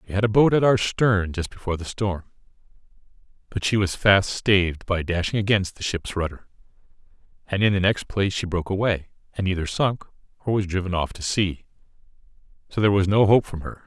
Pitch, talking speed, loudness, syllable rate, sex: 95 Hz, 200 wpm, -22 LUFS, 5.9 syllables/s, male